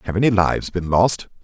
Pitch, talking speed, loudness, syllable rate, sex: 100 Hz, 210 wpm, -19 LUFS, 6.0 syllables/s, male